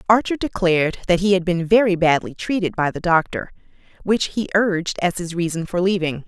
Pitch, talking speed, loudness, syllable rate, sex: 185 Hz, 190 wpm, -20 LUFS, 5.6 syllables/s, female